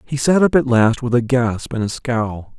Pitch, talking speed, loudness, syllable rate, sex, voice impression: 125 Hz, 255 wpm, -17 LUFS, 4.4 syllables/s, male, very masculine, old, very thick, relaxed, slightly weak, dark, slightly hard, clear, fluent, slightly cool, intellectual, sincere, very calm, very mature, slightly friendly, slightly reassuring, unique, slightly elegant, wild, slightly sweet, lively, kind, modest